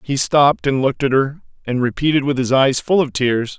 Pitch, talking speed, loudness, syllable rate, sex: 135 Hz, 235 wpm, -17 LUFS, 5.5 syllables/s, male